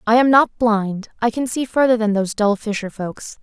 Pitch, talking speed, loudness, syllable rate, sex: 225 Hz, 210 wpm, -18 LUFS, 5.3 syllables/s, female